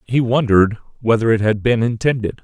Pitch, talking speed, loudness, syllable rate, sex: 115 Hz, 175 wpm, -17 LUFS, 5.8 syllables/s, male